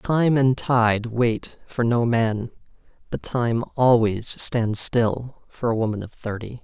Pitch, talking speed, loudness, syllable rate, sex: 115 Hz, 145 wpm, -21 LUFS, 3.4 syllables/s, male